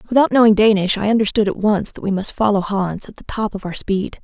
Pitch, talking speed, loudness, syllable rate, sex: 205 Hz, 255 wpm, -17 LUFS, 5.9 syllables/s, female